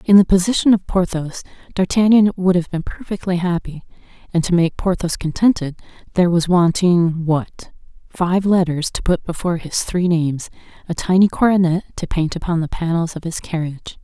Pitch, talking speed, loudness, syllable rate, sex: 175 Hz, 160 wpm, -18 LUFS, 5.3 syllables/s, female